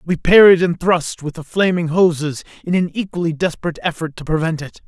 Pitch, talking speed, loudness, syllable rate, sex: 170 Hz, 195 wpm, -17 LUFS, 5.7 syllables/s, male